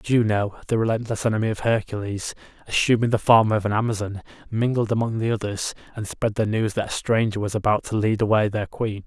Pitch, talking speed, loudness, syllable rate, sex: 110 Hz, 205 wpm, -23 LUFS, 5.9 syllables/s, male